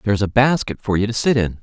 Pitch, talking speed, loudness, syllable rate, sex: 110 Hz, 295 wpm, -18 LUFS, 6.7 syllables/s, male